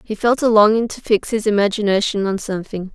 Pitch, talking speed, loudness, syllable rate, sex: 210 Hz, 205 wpm, -17 LUFS, 6.0 syllables/s, female